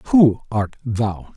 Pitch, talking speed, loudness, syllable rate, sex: 125 Hz, 130 wpm, -19 LUFS, 2.7 syllables/s, male